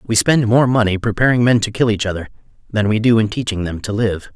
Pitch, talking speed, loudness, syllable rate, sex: 110 Hz, 250 wpm, -16 LUFS, 5.9 syllables/s, male